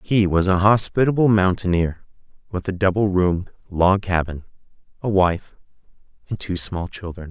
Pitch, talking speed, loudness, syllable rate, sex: 95 Hz, 140 wpm, -20 LUFS, 4.9 syllables/s, male